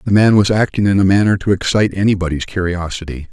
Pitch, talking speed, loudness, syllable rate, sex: 95 Hz, 200 wpm, -15 LUFS, 6.6 syllables/s, male